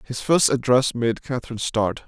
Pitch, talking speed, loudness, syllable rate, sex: 120 Hz, 175 wpm, -21 LUFS, 5.1 syllables/s, male